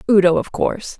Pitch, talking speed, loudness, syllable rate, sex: 195 Hz, 180 wpm, -17 LUFS, 6.3 syllables/s, female